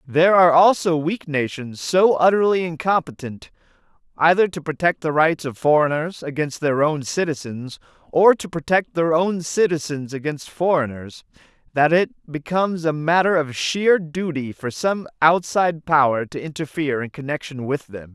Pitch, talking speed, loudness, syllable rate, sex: 155 Hz, 150 wpm, -20 LUFS, 4.8 syllables/s, male